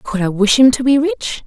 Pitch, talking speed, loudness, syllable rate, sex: 245 Hz, 285 wpm, -14 LUFS, 5.0 syllables/s, female